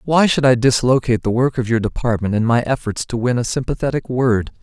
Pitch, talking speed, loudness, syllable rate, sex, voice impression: 125 Hz, 220 wpm, -17 LUFS, 5.9 syllables/s, male, very masculine, very middle-aged, thick, tensed, slightly powerful, bright, slightly soft, clear, fluent, cool, intellectual, refreshing, slightly sincere, calm, friendly, reassuring, unique, elegant, wild, very sweet, lively, kind, slightly modest